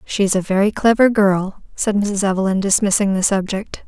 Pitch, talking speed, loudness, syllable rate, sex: 200 Hz, 170 wpm, -17 LUFS, 4.9 syllables/s, female